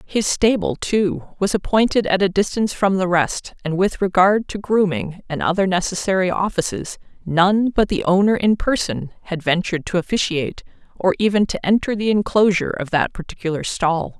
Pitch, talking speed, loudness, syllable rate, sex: 190 Hz, 170 wpm, -19 LUFS, 5.2 syllables/s, female